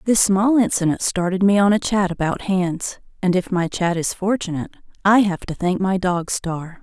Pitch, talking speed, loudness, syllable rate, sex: 190 Hz, 200 wpm, -20 LUFS, 4.9 syllables/s, female